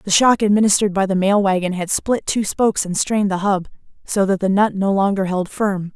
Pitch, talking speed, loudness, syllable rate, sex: 195 Hz, 230 wpm, -18 LUFS, 5.6 syllables/s, female